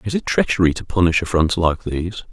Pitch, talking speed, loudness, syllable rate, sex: 95 Hz, 205 wpm, -19 LUFS, 6.0 syllables/s, male